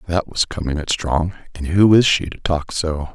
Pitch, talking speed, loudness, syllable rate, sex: 85 Hz, 230 wpm, -18 LUFS, 4.7 syllables/s, male